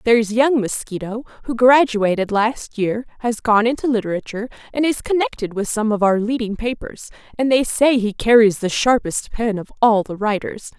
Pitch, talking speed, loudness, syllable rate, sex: 225 Hz, 180 wpm, -18 LUFS, 5.1 syllables/s, female